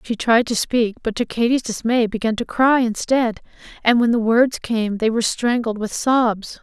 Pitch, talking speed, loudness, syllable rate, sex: 230 Hz, 200 wpm, -19 LUFS, 4.7 syllables/s, female